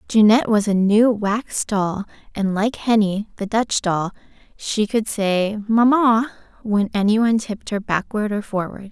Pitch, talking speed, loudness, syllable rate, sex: 210 Hz, 155 wpm, -19 LUFS, 4.3 syllables/s, female